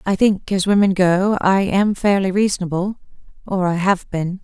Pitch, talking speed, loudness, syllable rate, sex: 190 Hz, 160 wpm, -18 LUFS, 4.7 syllables/s, female